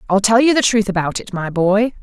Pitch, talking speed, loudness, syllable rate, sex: 210 Hz, 265 wpm, -16 LUFS, 5.6 syllables/s, female